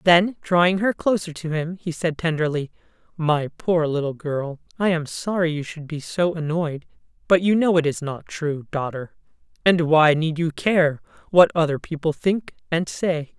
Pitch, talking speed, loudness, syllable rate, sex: 165 Hz, 180 wpm, -22 LUFS, 4.5 syllables/s, female